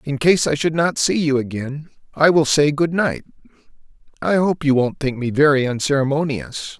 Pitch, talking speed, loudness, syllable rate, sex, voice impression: 145 Hz, 185 wpm, -18 LUFS, 4.9 syllables/s, male, masculine, middle-aged, slightly powerful, clear, slightly halting, raspy, slightly calm, mature, friendly, wild, slightly lively, slightly intense